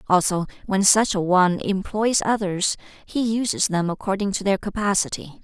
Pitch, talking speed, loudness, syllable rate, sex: 195 Hz, 155 wpm, -21 LUFS, 5.1 syllables/s, female